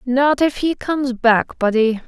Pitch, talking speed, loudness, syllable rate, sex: 255 Hz, 175 wpm, -17 LUFS, 4.2 syllables/s, female